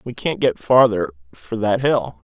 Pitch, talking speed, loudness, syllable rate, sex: 110 Hz, 180 wpm, -18 LUFS, 4.2 syllables/s, male